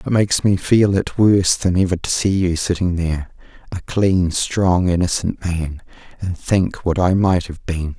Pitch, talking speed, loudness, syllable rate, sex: 90 Hz, 190 wpm, -18 LUFS, 4.5 syllables/s, male